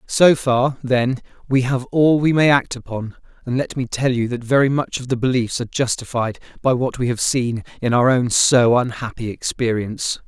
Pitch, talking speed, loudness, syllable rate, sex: 125 Hz, 200 wpm, -19 LUFS, 4.9 syllables/s, male